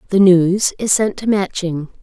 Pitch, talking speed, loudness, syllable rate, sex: 190 Hz, 180 wpm, -15 LUFS, 4.3 syllables/s, female